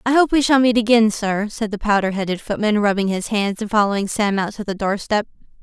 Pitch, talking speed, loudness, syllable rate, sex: 210 Hz, 245 wpm, -19 LUFS, 6.0 syllables/s, female